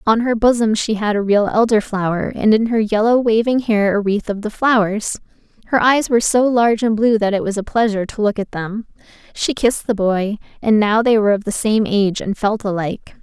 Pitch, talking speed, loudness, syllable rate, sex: 215 Hz, 225 wpm, -17 LUFS, 5.6 syllables/s, female